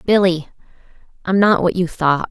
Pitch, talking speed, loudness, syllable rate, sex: 180 Hz, 130 wpm, -17 LUFS, 4.8 syllables/s, female